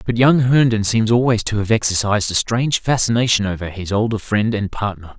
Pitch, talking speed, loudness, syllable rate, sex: 110 Hz, 195 wpm, -17 LUFS, 5.7 syllables/s, male